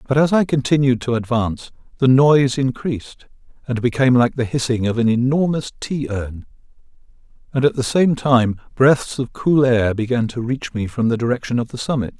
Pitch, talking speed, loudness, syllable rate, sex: 125 Hz, 185 wpm, -18 LUFS, 5.3 syllables/s, male